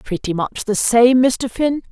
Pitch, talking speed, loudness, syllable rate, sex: 235 Hz, 190 wpm, -16 LUFS, 4.0 syllables/s, female